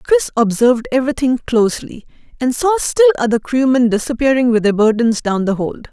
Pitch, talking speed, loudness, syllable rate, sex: 245 Hz, 160 wpm, -15 LUFS, 5.8 syllables/s, female